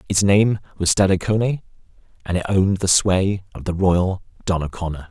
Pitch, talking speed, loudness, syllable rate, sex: 95 Hz, 155 wpm, -20 LUFS, 5.3 syllables/s, male